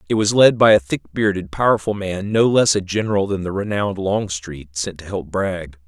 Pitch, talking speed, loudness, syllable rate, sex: 95 Hz, 215 wpm, -19 LUFS, 5.3 syllables/s, male